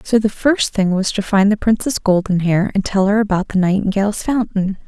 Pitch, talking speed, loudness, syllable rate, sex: 200 Hz, 210 wpm, -16 LUFS, 5.3 syllables/s, female